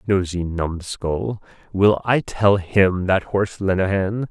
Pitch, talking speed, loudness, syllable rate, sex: 95 Hz, 125 wpm, -20 LUFS, 3.7 syllables/s, male